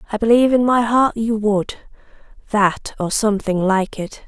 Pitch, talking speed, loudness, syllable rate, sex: 215 Hz, 155 wpm, -17 LUFS, 4.8 syllables/s, female